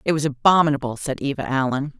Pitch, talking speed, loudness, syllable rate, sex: 140 Hz, 180 wpm, -21 LUFS, 6.4 syllables/s, female